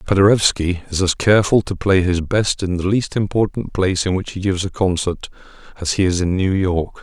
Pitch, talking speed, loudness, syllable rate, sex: 95 Hz, 215 wpm, -18 LUFS, 5.5 syllables/s, male